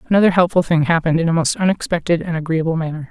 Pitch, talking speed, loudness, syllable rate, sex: 170 Hz, 215 wpm, -17 LUFS, 7.3 syllables/s, female